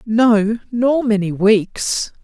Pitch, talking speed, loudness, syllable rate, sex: 220 Hz, 80 wpm, -16 LUFS, 2.6 syllables/s, female